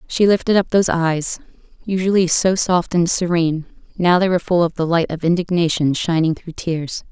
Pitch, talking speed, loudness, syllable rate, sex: 175 Hz, 185 wpm, -18 LUFS, 5.4 syllables/s, female